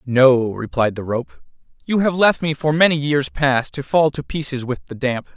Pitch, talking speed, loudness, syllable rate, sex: 140 Hz, 215 wpm, -18 LUFS, 4.7 syllables/s, male